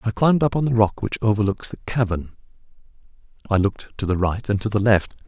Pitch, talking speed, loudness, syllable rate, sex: 105 Hz, 215 wpm, -21 LUFS, 6.3 syllables/s, male